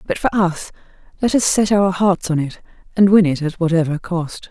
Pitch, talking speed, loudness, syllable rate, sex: 180 Hz, 215 wpm, -17 LUFS, 5.1 syllables/s, female